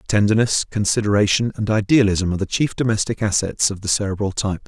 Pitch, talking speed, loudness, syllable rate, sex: 105 Hz, 165 wpm, -19 LUFS, 6.4 syllables/s, male